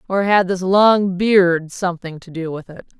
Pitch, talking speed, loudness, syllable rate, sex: 185 Hz, 200 wpm, -16 LUFS, 4.4 syllables/s, female